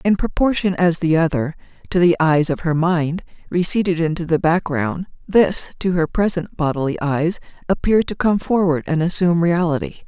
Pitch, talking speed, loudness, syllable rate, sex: 170 Hz, 165 wpm, -18 LUFS, 5.1 syllables/s, female